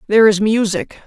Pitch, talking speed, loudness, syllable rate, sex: 215 Hz, 170 wpm, -15 LUFS, 5.7 syllables/s, female